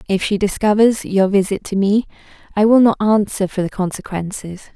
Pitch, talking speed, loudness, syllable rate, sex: 200 Hz, 175 wpm, -17 LUFS, 5.3 syllables/s, female